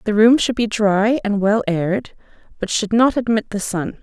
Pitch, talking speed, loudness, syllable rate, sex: 210 Hz, 210 wpm, -18 LUFS, 4.7 syllables/s, female